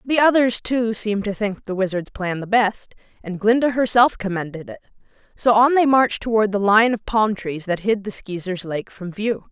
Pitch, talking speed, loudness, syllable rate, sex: 210 Hz, 210 wpm, -19 LUFS, 5.0 syllables/s, female